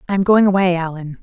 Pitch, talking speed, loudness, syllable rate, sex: 180 Hz, 245 wpm, -16 LUFS, 6.7 syllables/s, female